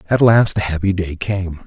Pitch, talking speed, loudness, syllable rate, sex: 95 Hz, 215 wpm, -17 LUFS, 4.7 syllables/s, male